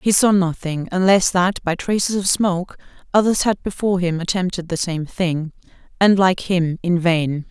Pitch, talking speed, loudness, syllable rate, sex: 180 Hz, 175 wpm, -19 LUFS, 4.8 syllables/s, female